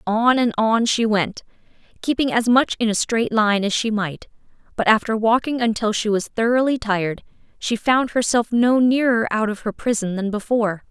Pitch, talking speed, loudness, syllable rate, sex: 225 Hz, 185 wpm, -19 LUFS, 5.0 syllables/s, female